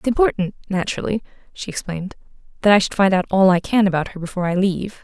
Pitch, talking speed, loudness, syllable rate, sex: 195 Hz, 215 wpm, -19 LUFS, 7.4 syllables/s, female